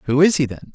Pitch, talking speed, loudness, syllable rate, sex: 140 Hz, 320 wpm, -18 LUFS, 6.8 syllables/s, male